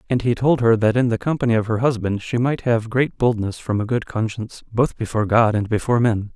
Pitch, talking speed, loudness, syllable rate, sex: 115 Hz, 245 wpm, -20 LUFS, 6.0 syllables/s, male